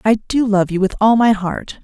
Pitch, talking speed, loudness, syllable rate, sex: 210 Hz, 260 wpm, -16 LUFS, 4.8 syllables/s, female